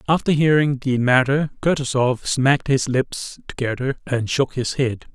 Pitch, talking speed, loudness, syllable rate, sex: 130 Hz, 150 wpm, -20 LUFS, 4.6 syllables/s, male